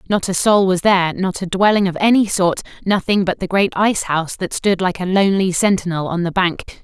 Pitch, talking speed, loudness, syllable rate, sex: 185 Hz, 230 wpm, -17 LUFS, 5.7 syllables/s, female